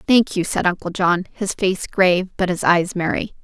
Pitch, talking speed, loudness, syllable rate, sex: 185 Hz, 210 wpm, -19 LUFS, 4.9 syllables/s, female